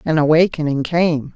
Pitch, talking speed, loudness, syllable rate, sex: 155 Hz, 135 wpm, -16 LUFS, 4.8 syllables/s, female